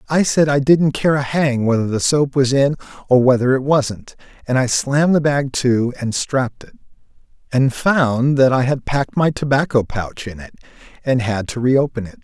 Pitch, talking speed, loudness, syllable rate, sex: 130 Hz, 200 wpm, -17 LUFS, 5.0 syllables/s, male